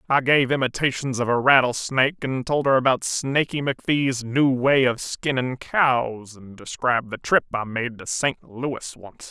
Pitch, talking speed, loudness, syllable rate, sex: 130 Hz, 175 wpm, -22 LUFS, 4.6 syllables/s, male